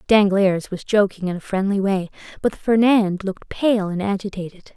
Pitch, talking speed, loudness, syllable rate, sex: 200 Hz, 165 wpm, -20 LUFS, 5.1 syllables/s, female